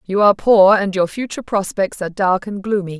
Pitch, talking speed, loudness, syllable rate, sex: 195 Hz, 220 wpm, -16 LUFS, 5.9 syllables/s, female